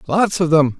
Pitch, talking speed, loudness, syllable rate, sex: 165 Hz, 225 wpm, -16 LUFS, 4.5 syllables/s, male